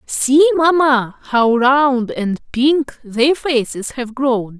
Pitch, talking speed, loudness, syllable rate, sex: 260 Hz, 130 wpm, -15 LUFS, 2.8 syllables/s, female